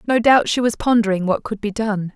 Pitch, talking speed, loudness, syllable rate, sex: 215 Hz, 250 wpm, -18 LUFS, 5.5 syllables/s, female